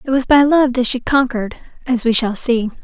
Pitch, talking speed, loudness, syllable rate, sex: 250 Hz, 210 wpm, -15 LUFS, 5.5 syllables/s, female